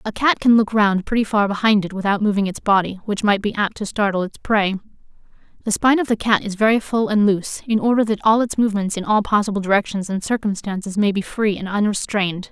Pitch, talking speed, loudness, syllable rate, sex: 205 Hz, 230 wpm, -19 LUFS, 6.1 syllables/s, female